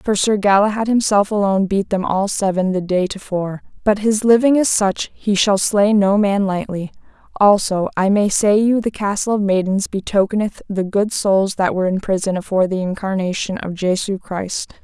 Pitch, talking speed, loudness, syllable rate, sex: 200 Hz, 190 wpm, -17 LUFS, 5.0 syllables/s, female